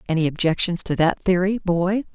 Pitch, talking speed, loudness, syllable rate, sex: 180 Hz, 170 wpm, -21 LUFS, 5.4 syllables/s, female